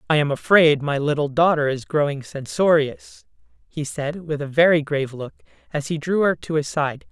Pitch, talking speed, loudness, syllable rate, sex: 150 Hz, 195 wpm, -21 LUFS, 5.1 syllables/s, female